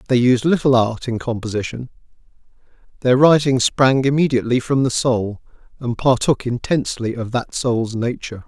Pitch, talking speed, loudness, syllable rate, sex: 125 Hz, 140 wpm, -18 LUFS, 5.2 syllables/s, male